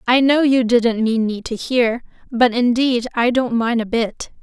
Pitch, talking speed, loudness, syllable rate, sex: 240 Hz, 205 wpm, -17 LUFS, 4.1 syllables/s, female